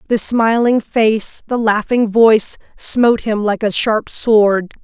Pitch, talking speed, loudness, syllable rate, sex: 220 Hz, 150 wpm, -14 LUFS, 3.7 syllables/s, female